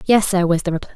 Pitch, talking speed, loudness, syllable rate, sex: 180 Hz, 315 wpm, -18 LUFS, 7.6 syllables/s, female